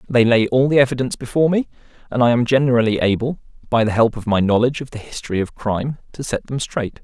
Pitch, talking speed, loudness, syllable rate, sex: 120 Hz, 230 wpm, -18 LUFS, 6.8 syllables/s, male